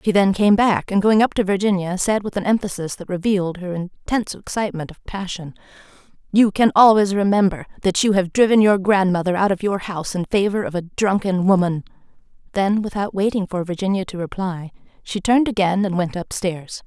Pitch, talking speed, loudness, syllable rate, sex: 190 Hz, 190 wpm, -19 LUFS, 5.7 syllables/s, female